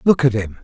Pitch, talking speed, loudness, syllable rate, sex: 120 Hz, 285 wpm, -17 LUFS, 5.9 syllables/s, male